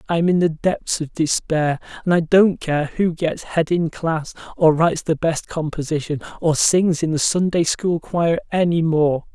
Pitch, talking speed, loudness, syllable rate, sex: 165 Hz, 185 wpm, -19 LUFS, 4.3 syllables/s, male